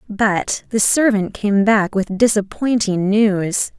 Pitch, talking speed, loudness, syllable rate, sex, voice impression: 205 Hz, 125 wpm, -17 LUFS, 3.5 syllables/s, female, feminine, adult-like, relaxed, slightly weak, clear, slightly raspy, intellectual, calm, elegant, slightly sharp, modest